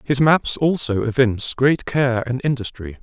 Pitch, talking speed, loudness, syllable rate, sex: 125 Hz, 160 wpm, -19 LUFS, 4.5 syllables/s, male